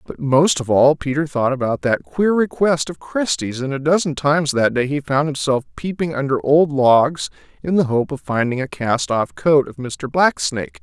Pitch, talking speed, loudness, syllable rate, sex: 140 Hz, 210 wpm, -18 LUFS, 4.8 syllables/s, male